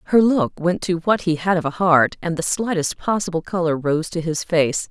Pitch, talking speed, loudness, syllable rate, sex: 170 Hz, 230 wpm, -20 LUFS, 5.0 syllables/s, female